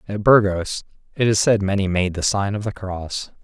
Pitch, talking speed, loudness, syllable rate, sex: 100 Hz, 210 wpm, -20 LUFS, 4.9 syllables/s, male